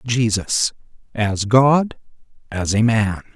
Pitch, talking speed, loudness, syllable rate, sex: 115 Hz, 105 wpm, -18 LUFS, 3.1 syllables/s, male